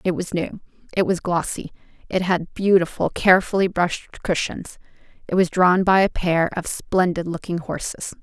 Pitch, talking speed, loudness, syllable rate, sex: 180 Hz, 160 wpm, -21 LUFS, 5.0 syllables/s, female